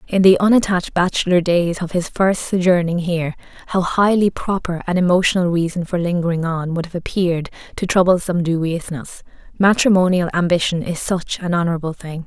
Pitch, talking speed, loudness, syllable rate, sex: 175 Hz, 155 wpm, -18 LUFS, 5.7 syllables/s, female